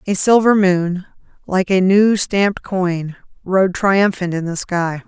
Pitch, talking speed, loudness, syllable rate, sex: 185 Hz, 155 wpm, -16 LUFS, 3.8 syllables/s, female